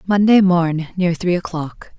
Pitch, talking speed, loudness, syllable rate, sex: 175 Hz, 150 wpm, -17 LUFS, 3.9 syllables/s, female